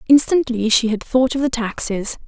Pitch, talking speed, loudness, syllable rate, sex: 240 Hz, 185 wpm, -18 LUFS, 4.9 syllables/s, female